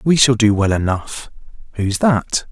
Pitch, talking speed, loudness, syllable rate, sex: 115 Hz, 145 wpm, -16 LUFS, 4.1 syllables/s, male